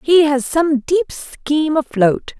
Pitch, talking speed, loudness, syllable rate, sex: 295 Hz, 150 wpm, -16 LUFS, 3.5 syllables/s, female